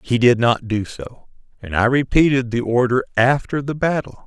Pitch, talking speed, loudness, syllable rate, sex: 125 Hz, 185 wpm, -18 LUFS, 4.8 syllables/s, male